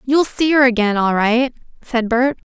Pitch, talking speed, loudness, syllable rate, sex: 245 Hz, 190 wpm, -16 LUFS, 4.5 syllables/s, female